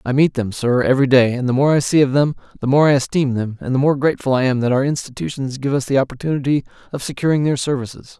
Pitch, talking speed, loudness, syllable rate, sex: 135 Hz, 255 wpm, -18 LUFS, 6.8 syllables/s, male